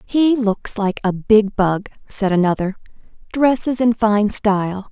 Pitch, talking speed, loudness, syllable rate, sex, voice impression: 210 Hz, 145 wpm, -17 LUFS, 4.0 syllables/s, female, very feminine, slightly adult-like, very thin, slightly tensed, powerful, bright, soft, clear, fluent, raspy, cute, intellectual, very refreshing, sincere, slightly calm, slightly friendly, slightly reassuring, unique, slightly elegant, slightly wild, sweet, very lively, slightly kind, slightly intense, slightly sharp, light